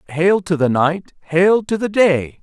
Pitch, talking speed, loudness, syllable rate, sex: 175 Hz, 200 wpm, -16 LUFS, 3.7 syllables/s, male